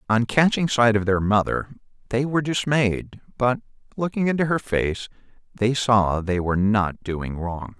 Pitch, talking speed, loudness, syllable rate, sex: 115 Hz, 160 wpm, -22 LUFS, 4.6 syllables/s, male